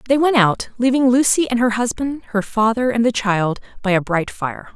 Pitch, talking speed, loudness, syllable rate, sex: 230 Hz, 215 wpm, -18 LUFS, 5.0 syllables/s, female